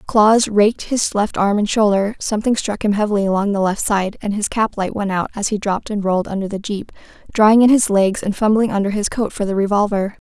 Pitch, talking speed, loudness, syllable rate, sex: 205 Hz, 240 wpm, -17 LUFS, 5.9 syllables/s, female